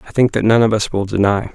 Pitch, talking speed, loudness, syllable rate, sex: 110 Hz, 310 wpm, -15 LUFS, 6.4 syllables/s, male